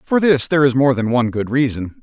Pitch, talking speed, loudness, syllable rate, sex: 135 Hz, 265 wpm, -16 LUFS, 6.2 syllables/s, male